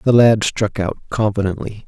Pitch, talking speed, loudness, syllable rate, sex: 105 Hz, 160 wpm, -18 LUFS, 4.9 syllables/s, male